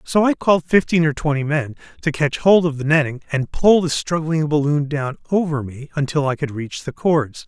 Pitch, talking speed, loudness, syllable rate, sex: 150 Hz, 215 wpm, -19 LUFS, 5.1 syllables/s, male